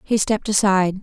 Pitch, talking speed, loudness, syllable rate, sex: 200 Hz, 175 wpm, -18 LUFS, 6.5 syllables/s, female